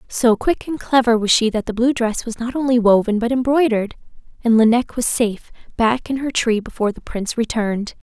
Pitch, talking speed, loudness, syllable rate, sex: 235 Hz, 205 wpm, -18 LUFS, 5.8 syllables/s, female